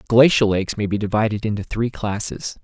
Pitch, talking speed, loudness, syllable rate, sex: 110 Hz, 180 wpm, -20 LUFS, 5.7 syllables/s, male